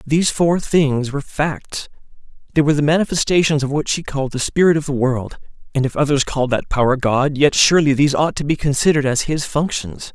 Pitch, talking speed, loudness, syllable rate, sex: 145 Hz, 195 wpm, -17 LUFS, 6.0 syllables/s, male